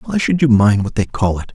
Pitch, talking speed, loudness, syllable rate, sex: 115 Hz, 310 wpm, -15 LUFS, 5.8 syllables/s, male